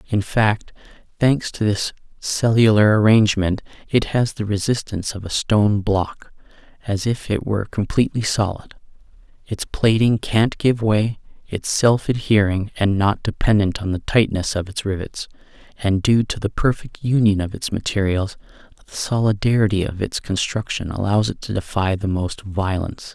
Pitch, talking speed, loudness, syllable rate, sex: 105 Hz, 155 wpm, -20 LUFS, 4.8 syllables/s, male